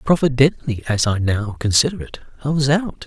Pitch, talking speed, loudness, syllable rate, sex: 130 Hz, 175 wpm, -18 LUFS, 5.4 syllables/s, male